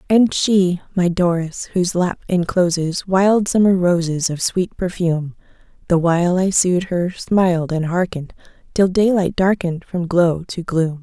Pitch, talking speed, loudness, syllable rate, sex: 180 Hz, 150 wpm, -18 LUFS, 4.5 syllables/s, female